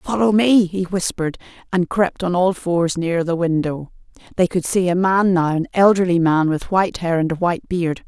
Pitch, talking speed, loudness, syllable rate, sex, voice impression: 180 Hz, 210 wpm, -18 LUFS, 5.2 syllables/s, female, very feminine, adult-like, slightly calm, elegant, slightly sweet